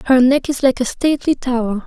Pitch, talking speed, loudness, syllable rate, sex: 255 Hz, 225 wpm, -16 LUFS, 5.9 syllables/s, female